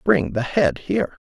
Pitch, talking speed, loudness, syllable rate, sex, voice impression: 160 Hz, 190 wpm, -21 LUFS, 4.6 syllables/s, male, very masculine, very adult-like, slightly old, very thick, slightly tensed, powerful, slightly dark, hard, very clear, very fluent, very cool, very intellectual, sincere, calm, very mature, very friendly, very reassuring, unique, slightly elegant, very wild, very kind, slightly modest